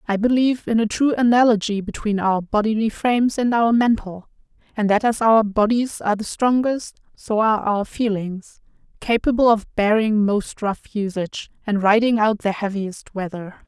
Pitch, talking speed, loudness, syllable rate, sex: 215 Hz, 160 wpm, -20 LUFS, 4.9 syllables/s, female